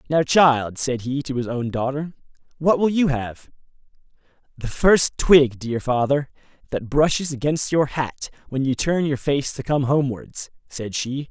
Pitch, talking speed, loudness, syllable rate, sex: 135 Hz, 170 wpm, -21 LUFS, 4.3 syllables/s, male